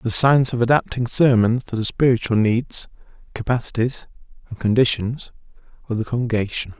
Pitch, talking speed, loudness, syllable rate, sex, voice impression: 120 Hz, 135 wpm, -20 LUFS, 5.5 syllables/s, male, masculine, adult-like, slightly relaxed, weak, soft, raspy, cool, calm, slightly mature, friendly, reassuring, wild, slightly modest